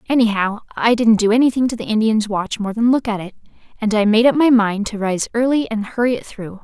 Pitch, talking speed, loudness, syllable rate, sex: 225 Hz, 245 wpm, -17 LUFS, 5.8 syllables/s, female